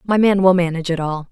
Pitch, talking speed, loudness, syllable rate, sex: 180 Hz, 275 wpm, -17 LUFS, 6.7 syllables/s, female